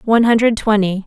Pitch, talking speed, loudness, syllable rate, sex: 215 Hz, 170 wpm, -14 LUFS, 6.2 syllables/s, female